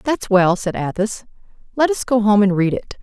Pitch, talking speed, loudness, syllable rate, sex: 210 Hz, 220 wpm, -17 LUFS, 5.1 syllables/s, female